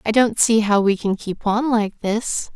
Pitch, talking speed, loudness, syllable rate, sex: 215 Hz, 235 wpm, -19 LUFS, 4.1 syllables/s, female